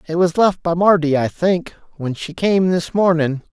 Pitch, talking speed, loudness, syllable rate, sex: 170 Hz, 205 wpm, -17 LUFS, 4.6 syllables/s, male